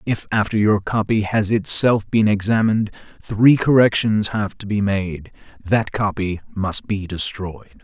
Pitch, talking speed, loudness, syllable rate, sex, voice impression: 105 Hz, 145 wpm, -19 LUFS, 4.2 syllables/s, male, masculine, middle-aged, powerful, clear, mature, slightly unique, wild, lively, strict